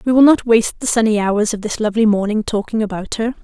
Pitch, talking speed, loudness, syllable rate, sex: 220 Hz, 245 wpm, -16 LUFS, 6.4 syllables/s, female